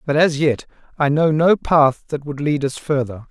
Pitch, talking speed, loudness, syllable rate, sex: 145 Hz, 220 wpm, -18 LUFS, 4.6 syllables/s, male